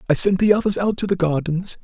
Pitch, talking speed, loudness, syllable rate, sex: 185 Hz, 260 wpm, -19 LUFS, 6.2 syllables/s, male